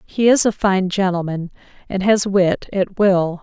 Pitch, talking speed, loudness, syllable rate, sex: 190 Hz, 175 wpm, -17 LUFS, 4.1 syllables/s, female